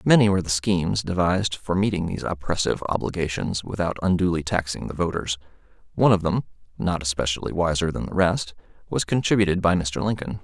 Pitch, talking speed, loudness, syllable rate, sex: 90 Hz, 165 wpm, -23 LUFS, 6.2 syllables/s, male